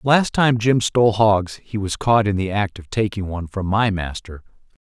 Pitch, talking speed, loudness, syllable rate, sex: 105 Hz, 235 wpm, -19 LUFS, 5.2 syllables/s, male